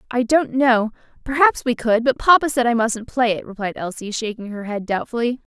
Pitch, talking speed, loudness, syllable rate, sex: 235 Hz, 205 wpm, -19 LUFS, 5.4 syllables/s, female